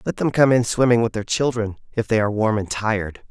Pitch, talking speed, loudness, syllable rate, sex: 110 Hz, 255 wpm, -20 LUFS, 5.9 syllables/s, male